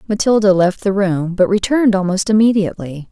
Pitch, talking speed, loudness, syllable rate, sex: 195 Hz, 155 wpm, -15 LUFS, 5.8 syllables/s, female